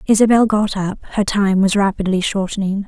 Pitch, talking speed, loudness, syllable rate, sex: 200 Hz, 165 wpm, -16 LUFS, 5.1 syllables/s, female